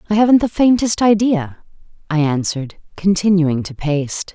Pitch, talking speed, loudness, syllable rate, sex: 180 Hz, 140 wpm, -16 LUFS, 5.1 syllables/s, female